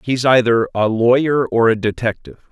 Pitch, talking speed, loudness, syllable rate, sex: 120 Hz, 165 wpm, -16 LUFS, 5.4 syllables/s, male